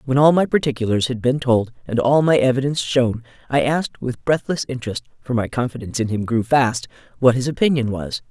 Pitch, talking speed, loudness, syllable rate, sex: 125 Hz, 190 wpm, -19 LUFS, 5.9 syllables/s, female